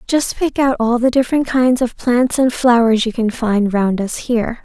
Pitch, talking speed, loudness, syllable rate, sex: 240 Hz, 220 wpm, -16 LUFS, 4.7 syllables/s, female